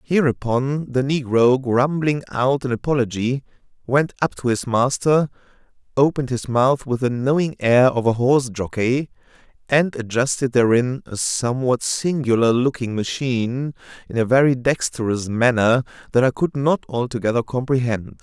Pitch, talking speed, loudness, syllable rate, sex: 125 Hz, 140 wpm, -20 LUFS, 4.8 syllables/s, male